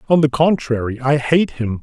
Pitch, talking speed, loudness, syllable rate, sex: 135 Hz, 195 wpm, -17 LUFS, 4.9 syllables/s, male